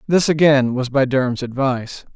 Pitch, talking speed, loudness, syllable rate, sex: 135 Hz, 165 wpm, -17 LUFS, 5.2 syllables/s, male